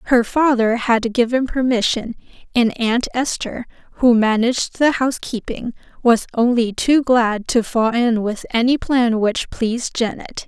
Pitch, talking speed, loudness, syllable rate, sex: 240 Hz, 145 wpm, -18 LUFS, 4.4 syllables/s, female